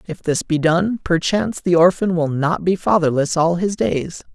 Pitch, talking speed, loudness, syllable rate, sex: 170 Hz, 195 wpm, -18 LUFS, 4.7 syllables/s, male